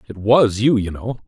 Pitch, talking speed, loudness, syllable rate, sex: 110 Hz, 235 wpm, -17 LUFS, 4.9 syllables/s, male